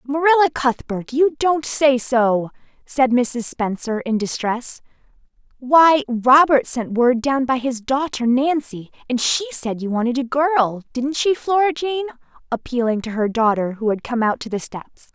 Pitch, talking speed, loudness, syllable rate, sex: 260 Hz, 160 wpm, -19 LUFS, 4.2 syllables/s, female